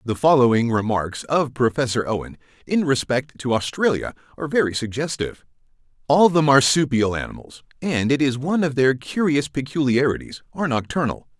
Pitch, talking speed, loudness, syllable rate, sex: 135 Hz, 125 wpm, -21 LUFS, 5.5 syllables/s, male